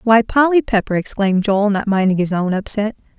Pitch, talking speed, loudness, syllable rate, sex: 210 Hz, 190 wpm, -17 LUFS, 5.5 syllables/s, female